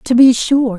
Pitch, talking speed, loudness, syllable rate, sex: 245 Hz, 230 wpm, -12 LUFS, 4.4 syllables/s, female